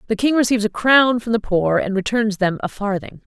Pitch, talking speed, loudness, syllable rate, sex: 220 Hz, 235 wpm, -18 LUFS, 5.6 syllables/s, female